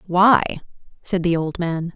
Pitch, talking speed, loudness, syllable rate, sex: 180 Hz, 155 wpm, -19 LUFS, 4.1 syllables/s, female